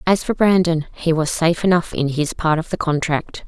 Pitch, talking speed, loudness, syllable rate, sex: 165 Hz, 225 wpm, -19 LUFS, 5.3 syllables/s, female